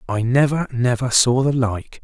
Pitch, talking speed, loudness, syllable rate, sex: 125 Hz, 175 wpm, -18 LUFS, 4.4 syllables/s, male